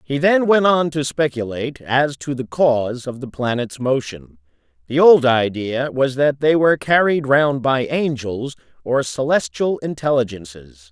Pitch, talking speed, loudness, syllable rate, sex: 135 Hz, 155 wpm, -18 LUFS, 4.4 syllables/s, male